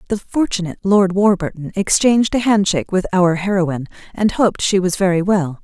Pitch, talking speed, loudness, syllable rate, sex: 190 Hz, 170 wpm, -17 LUFS, 5.8 syllables/s, female